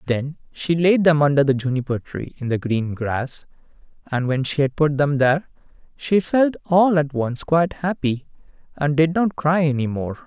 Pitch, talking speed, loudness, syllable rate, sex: 150 Hz, 185 wpm, -20 LUFS, 4.7 syllables/s, male